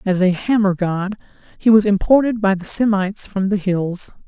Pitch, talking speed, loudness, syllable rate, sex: 200 Hz, 185 wpm, -17 LUFS, 5.0 syllables/s, female